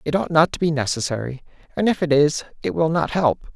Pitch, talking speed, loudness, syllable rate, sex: 150 Hz, 235 wpm, -20 LUFS, 5.8 syllables/s, male